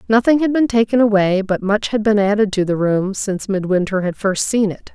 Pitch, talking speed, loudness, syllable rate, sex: 205 Hz, 230 wpm, -17 LUFS, 5.5 syllables/s, female